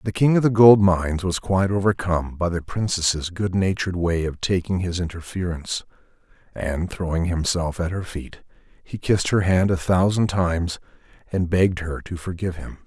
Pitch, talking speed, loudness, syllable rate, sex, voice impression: 90 Hz, 175 wpm, -22 LUFS, 5.4 syllables/s, male, very masculine, very adult-like, thick, slightly muffled, cool, calm, wild, slightly sweet